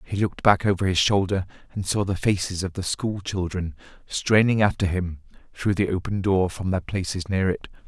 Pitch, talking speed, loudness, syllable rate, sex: 95 Hz, 200 wpm, -24 LUFS, 5.2 syllables/s, male